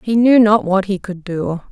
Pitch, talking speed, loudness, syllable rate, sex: 200 Hz, 245 wpm, -15 LUFS, 4.5 syllables/s, female